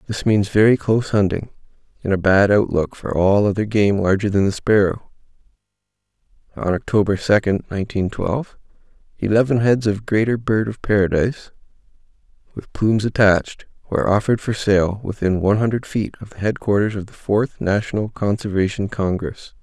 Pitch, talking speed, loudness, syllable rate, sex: 105 Hz, 150 wpm, -19 LUFS, 5.5 syllables/s, male